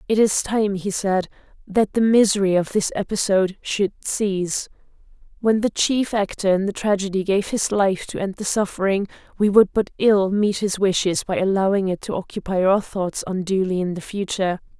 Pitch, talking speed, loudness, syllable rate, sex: 195 Hz, 180 wpm, -21 LUFS, 5.1 syllables/s, female